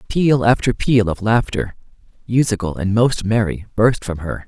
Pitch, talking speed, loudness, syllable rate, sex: 110 Hz, 160 wpm, -18 LUFS, 4.7 syllables/s, male